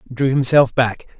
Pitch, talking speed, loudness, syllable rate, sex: 125 Hz, 150 wpm, -16 LUFS, 4.2 syllables/s, male